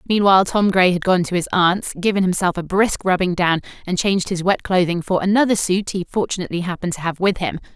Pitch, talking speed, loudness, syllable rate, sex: 185 Hz, 225 wpm, -18 LUFS, 6.2 syllables/s, female